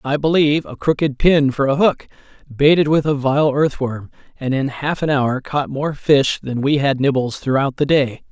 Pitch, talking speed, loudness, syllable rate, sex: 140 Hz, 200 wpm, -17 LUFS, 4.7 syllables/s, male